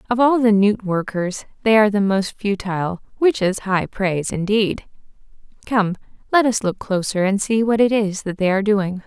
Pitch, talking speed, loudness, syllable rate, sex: 205 Hz, 190 wpm, -19 LUFS, 5.0 syllables/s, female